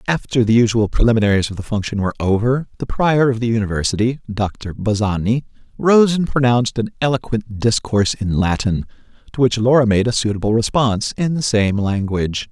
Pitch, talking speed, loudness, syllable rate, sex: 115 Hz, 170 wpm, -17 LUFS, 5.8 syllables/s, male